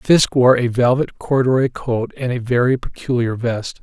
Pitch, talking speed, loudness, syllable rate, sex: 125 Hz, 170 wpm, -17 LUFS, 4.5 syllables/s, male